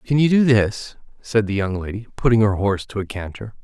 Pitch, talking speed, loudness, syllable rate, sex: 110 Hz, 230 wpm, -20 LUFS, 5.7 syllables/s, male